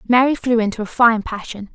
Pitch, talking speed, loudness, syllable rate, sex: 230 Hz, 205 wpm, -17 LUFS, 5.7 syllables/s, female